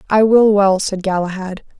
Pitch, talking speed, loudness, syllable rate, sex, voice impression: 200 Hz, 165 wpm, -14 LUFS, 4.8 syllables/s, female, very feminine, very adult-like, thin, tensed, slightly powerful, slightly dark, soft, slightly muffled, fluent, slightly raspy, cute, very intellectual, refreshing, very sincere, very calm, very friendly, reassuring, unique, very elegant, slightly wild, sweet, slightly lively, very kind, modest, slightly light